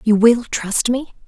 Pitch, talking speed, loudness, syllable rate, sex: 230 Hz, 190 wpm, -17 LUFS, 3.9 syllables/s, female